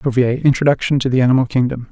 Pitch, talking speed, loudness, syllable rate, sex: 130 Hz, 190 wpm, -15 LUFS, 7.0 syllables/s, male